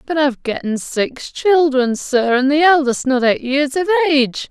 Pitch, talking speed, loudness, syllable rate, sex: 275 Hz, 185 wpm, -16 LUFS, 4.6 syllables/s, female